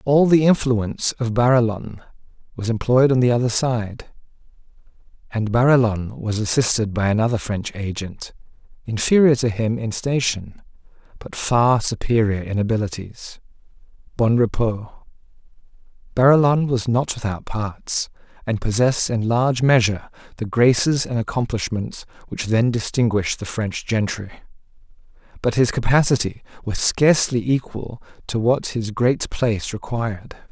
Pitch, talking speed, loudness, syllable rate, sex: 115 Hz, 120 wpm, -20 LUFS, 4.8 syllables/s, male